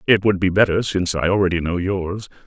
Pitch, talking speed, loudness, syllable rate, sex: 95 Hz, 220 wpm, -19 LUFS, 6.0 syllables/s, male